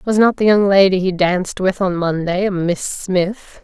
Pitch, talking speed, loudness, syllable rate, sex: 190 Hz, 215 wpm, -16 LUFS, 4.6 syllables/s, female